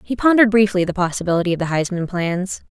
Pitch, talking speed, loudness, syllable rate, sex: 190 Hz, 200 wpm, -18 LUFS, 6.7 syllables/s, female